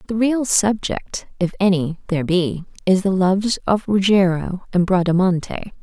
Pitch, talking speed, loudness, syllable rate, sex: 190 Hz, 145 wpm, -19 LUFS, 4.6 syllables/s, female